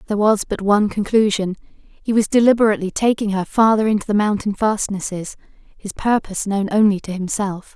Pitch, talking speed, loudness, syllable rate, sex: 205 Hz, 160 wpm, -18 LUFS, 5.7 syllables/s, female